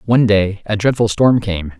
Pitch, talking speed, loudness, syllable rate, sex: 105 Hz, 200 wpm, -15 LUFS, 5.1 syllables/s, male